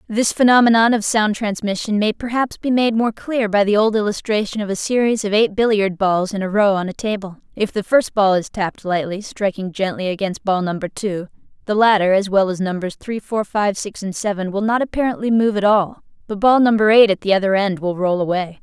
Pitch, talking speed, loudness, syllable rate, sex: 205 Hz, 225 wpm, -18 LUFS, 5.2 syllables/s, female